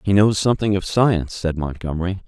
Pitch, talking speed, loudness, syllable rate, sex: 95 Hz, 185 wpm, -20 LUFS, 6.1 syllables/s, male